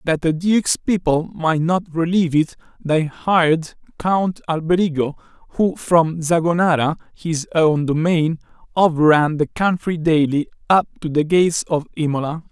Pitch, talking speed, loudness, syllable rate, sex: 165 Hz, 135 wpm, -18 LUFS, 4.5 syllables/s, male